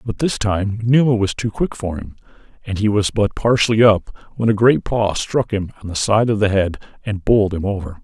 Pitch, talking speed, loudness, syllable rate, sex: 105 Hz, 230 wpm, -18 LUFS, 5.4 syllables/s, male